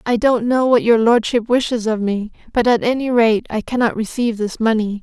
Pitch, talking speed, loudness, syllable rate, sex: 230 Hz, 215 wpm, -17 LUFS, 5.3 syllables/s, female